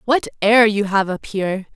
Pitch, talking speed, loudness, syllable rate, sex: 210 Hz, 205 wpm, -17 LUFS, 4.9 syllables/s, female